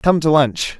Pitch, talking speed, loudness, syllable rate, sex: 150 Hz, 230 wpm, -16 LUFS, 4.0 syllables/s, male